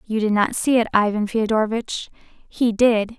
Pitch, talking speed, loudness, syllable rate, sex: 220 Hz, 170 wpm, -20 LUFS, 4.4 syllables/s, female